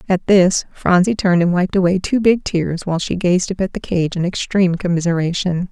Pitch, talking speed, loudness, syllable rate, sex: 180 Hz, 210 wpm, -17 LUFS, 5.5 syllables/s, female